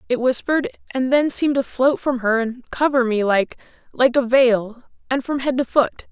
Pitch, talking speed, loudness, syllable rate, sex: 250 Hz, 195 wpm, -19 LUFS, 5.0 syllables/s, female